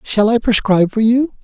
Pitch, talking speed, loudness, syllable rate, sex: 220 Hz, 210 wpm, -14 LUFS, 5.5 syllables/s, male